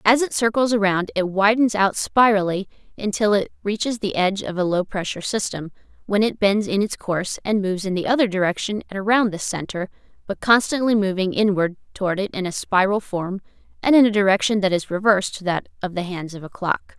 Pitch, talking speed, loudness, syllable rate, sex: 200 Hz, 205 wpm, -21 LUFS, 5.8 syllables/s, female